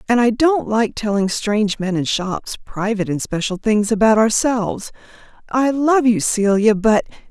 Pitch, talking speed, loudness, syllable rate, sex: 220 Hz, 165 wpm, -17 LUFS, 4.7 syllables/s, female